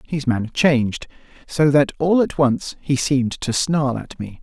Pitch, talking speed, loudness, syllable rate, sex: 135 Hz, 175 wpm, -19 LUFS, 4.5 syllables/s, male